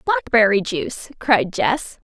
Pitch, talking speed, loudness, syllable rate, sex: 240 Hz, 115 wpm, -19 LUFS, 3.7 syllables/s, female